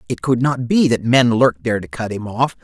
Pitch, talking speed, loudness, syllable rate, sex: 115 Hz, 275 wpm, -17 LUFS, 5.8 syllables/s, male